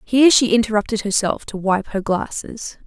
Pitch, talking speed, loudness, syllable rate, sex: 215 Hz, 170 wpm, -18 LUFS, 5.2 syllables/s, female